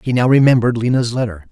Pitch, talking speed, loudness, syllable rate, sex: 120 Hz, 200 wpm, -15 LUFS, 7.1 syllables/s, male